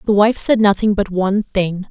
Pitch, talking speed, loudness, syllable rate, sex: 200 Hz, 220 wpm, -16 LUFS, 5.1 syllables/s, female